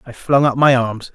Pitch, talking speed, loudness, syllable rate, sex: 130 Hz, 260 wpm, -15 LUFS, 4.9 syllables/s, male